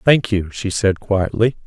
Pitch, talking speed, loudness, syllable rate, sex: 105 Hz, 180 wpm, -18 LUFS, 4.1 syllables/s, male